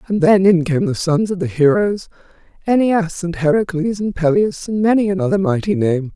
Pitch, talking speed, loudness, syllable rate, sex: 205 Hz, 185 wpm, -16 LUFS, 5.2 syllables/s, female